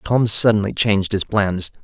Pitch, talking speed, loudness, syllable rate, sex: 100 Hz, 165 wpm, -18 LUFS, 4.7 syllables/s, male